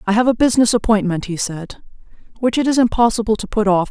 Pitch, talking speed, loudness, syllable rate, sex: 215 Hz, 215 wpm, -17 LUFS, 6.6 syllables/s, female